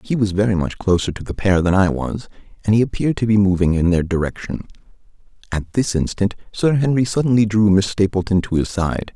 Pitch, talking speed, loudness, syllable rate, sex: 100 Hz, 210 wpm, -18 LUFS, 5.8 syllables/s, male